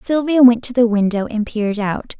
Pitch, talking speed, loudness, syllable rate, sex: 230 Hz, 220 wpm, -16 LUFS, 5.3 syllables/s, female